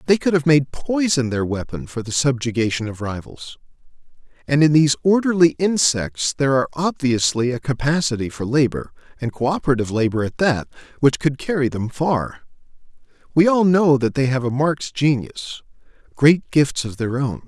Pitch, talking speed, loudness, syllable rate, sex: 135 Hz, 165 wpm, -19 LUFS, 5.3 syllables/s, male